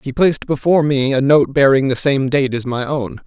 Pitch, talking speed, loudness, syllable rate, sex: 135 Hz, 240 wpm, -15 LUFS, 5.4 syllables/s, male